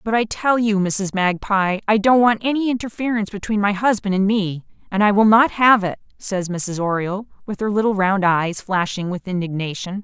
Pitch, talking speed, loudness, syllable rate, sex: 200 Hz, 195 wpm, -19 LUFS, 5.2 syllables/s, female